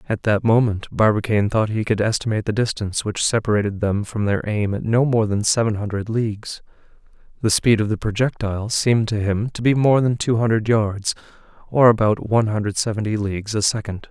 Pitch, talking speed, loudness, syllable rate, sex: 110 Hz, 195 wpm, -20 LUFS, 5.8 syllables/s, male